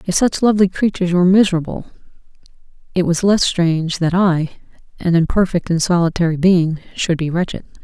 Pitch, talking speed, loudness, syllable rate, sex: 175 Hz, 155 wpm, -16 LUFS, 6.0 syllables/s, female